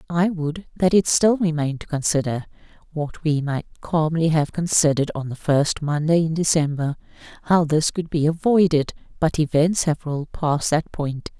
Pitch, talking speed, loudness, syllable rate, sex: 155 Hz, 165 wpm, -21 LUFS, 4.8 syllables/s, female